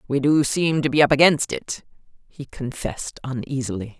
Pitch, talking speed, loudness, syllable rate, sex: 140 Hz, 165 wpm, -21 LUFS, 5.0 syllables/s, female